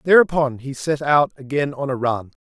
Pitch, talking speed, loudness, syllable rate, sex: 140 Hz, 195 wpm, -20 LUFS, 5.1 syllables/s, male